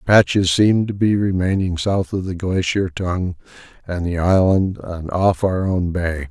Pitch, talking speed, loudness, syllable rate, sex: 90 Hz, 170 wpm, -19 LUFS, 4.3 syllables/s, male